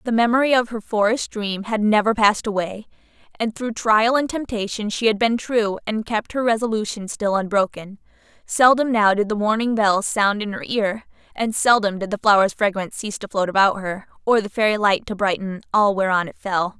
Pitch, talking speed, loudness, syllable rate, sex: 210 Hz, 200 wpm, -20 LUFS, 5.3 syllables/s, female